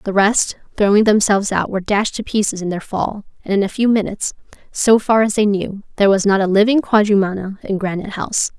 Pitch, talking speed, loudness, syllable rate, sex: 205 Hz, 215 wpm, -17 LUFS, 6.1 syllables/s, female